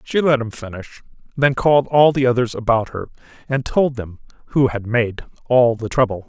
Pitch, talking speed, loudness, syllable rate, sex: 120 Hz, 190 wpm, -18 LUFS, 5.1 syllables/s, male